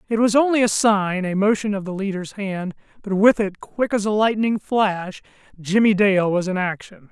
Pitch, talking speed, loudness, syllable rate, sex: 200 Hz, 195 wpm, -20 LUFS, 4.8 syllables/s, male